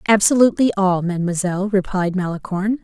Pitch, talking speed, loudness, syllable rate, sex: 195 Hz, 105 wpm, -18 LUFS, 6.6 syllables/s, female